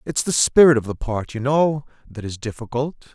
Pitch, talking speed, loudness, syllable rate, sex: 130 Hz, 210 wpm, -19 LUFS, 5.1 syllables/s, male